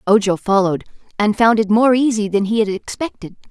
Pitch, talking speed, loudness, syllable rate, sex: 210 Hz, 190 wpm, -17 LUFS, 5.9 syllables/s, female